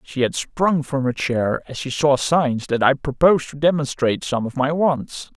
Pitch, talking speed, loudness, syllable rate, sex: 140 Hz, 210 wpm, -20 LUFS, 4.6 syllables/s, male